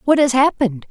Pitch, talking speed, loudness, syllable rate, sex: 250 Hz, 200 wpm, -16 LUFS, 6.3 syllables/s, female